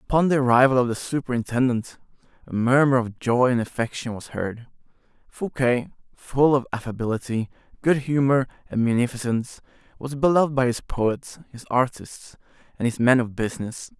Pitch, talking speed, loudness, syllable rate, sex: 125 Hz, 145 wpm, -23 LUFS, 5.4 syllables/s, male